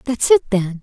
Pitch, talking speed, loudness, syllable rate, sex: 230 Hz, 215 wpm, -16 LUFS, 4.4 syllables/s, female